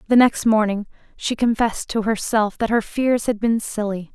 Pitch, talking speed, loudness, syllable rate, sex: 220 Hz, 190 wpm, -20 LUFS, 4.9 syllables/s, female